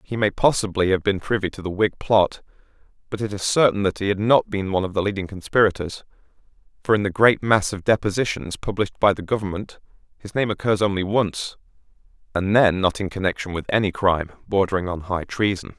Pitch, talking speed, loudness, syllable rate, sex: 100 Hz, 200 wpm, -21 LUFS, 5.9 syllables/s, male